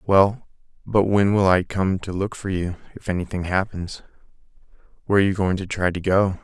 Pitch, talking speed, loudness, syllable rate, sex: 95 Hz, 195 wpm, -22 LUFS, 5.4 syllables/s, male